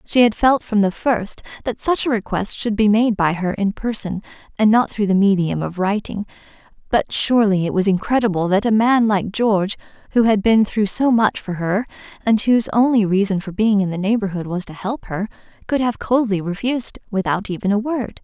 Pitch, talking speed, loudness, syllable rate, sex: 210 Hz, 205 wpm, -18 LUFS, 5.3 syllables/s, female